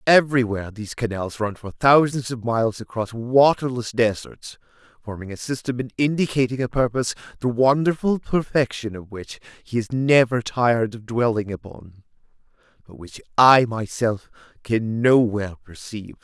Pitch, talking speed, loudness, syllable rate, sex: 120 Hz, 135 wpm, -21 LUFS, 4.2 syllables/s, male